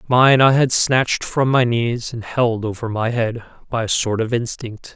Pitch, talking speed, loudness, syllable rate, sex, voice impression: 120 Hz, 205 wpm, -18 LUFS, 4.4 syllables/s, male, masculine, slightly young, adult-like, slightly thick, slightly tensed, slightly weak, slightly dark, slightly hard, slightly clear, slightly fluent, cool, intellectual, very refreshing, sincere, calm, friendly, reassuring, slightly wild, slightly lively, kind, slightly modest